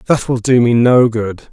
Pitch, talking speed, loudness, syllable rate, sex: 120 Hz, 235 wpm, -13 LUFS, 4.5 syllables/s, male